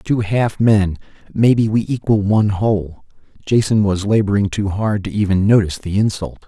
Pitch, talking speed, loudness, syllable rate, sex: 105 Hz, 160 wpm, -17 LUFS, 5.2 syllables/s, male